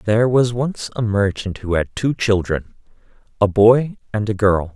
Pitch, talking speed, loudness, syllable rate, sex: 105 Hz, 175 wpm, -18 LUFS, 4.5 syllables/s, male